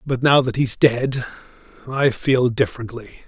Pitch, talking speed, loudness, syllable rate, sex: 125 Hz, 145 wpm, -19 LUFS, 4.7 syllables/s, male